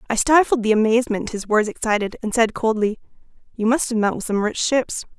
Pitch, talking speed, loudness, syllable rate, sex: 225 Hz, 210 wpm, -20 LUFS, 5.8 syllables/s, female